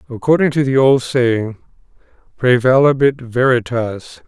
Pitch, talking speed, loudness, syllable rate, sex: 125 Hz, 100 wpm, -15 LUFS, 4.2 syllables/s, male